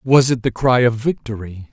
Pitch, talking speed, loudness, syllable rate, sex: 120 Hz, 210 wpm, -17 LUFS, 4.8 syllables/s, male